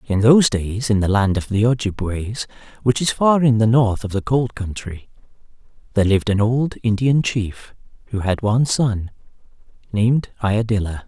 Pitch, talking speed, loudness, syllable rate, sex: 110 Hz, 170 wpm, -19 LUFS, 5.1 syllables/s, male